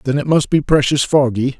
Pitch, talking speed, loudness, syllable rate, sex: 140 Hz, 225 wpm, -15 LUFS, 5.4 syllables/s, male